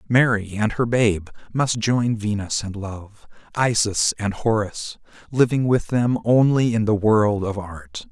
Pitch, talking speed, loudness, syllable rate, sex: 110 Hz, 155 wpm, -21 LUFS, 3.9 syllables/s, male